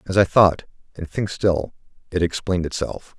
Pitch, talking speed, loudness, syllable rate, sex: 90 Hz, 130 wpm, -21 LUFS, 5.2 syllables/s, male